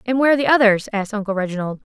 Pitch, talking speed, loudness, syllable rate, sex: 220 Hz, 250 wpm, -18 LUFS, 8.7 syllables/s, female